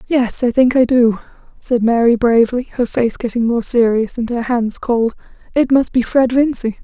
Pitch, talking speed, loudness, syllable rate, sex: 240 Hz, 195 wpm, -15 LUFS, 4.8 syllables/s, female